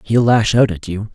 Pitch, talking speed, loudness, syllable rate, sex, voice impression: 110 Hz, 260 wpm, -15 LUFS, 4.8 syllables/s, male, masculine, adult-like, slightly fluent, slightly cool, sincere, friendly